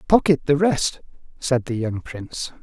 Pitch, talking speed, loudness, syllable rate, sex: 140 Hz, 160 wpm, -22 LUFS, 4.6 syllables/s, male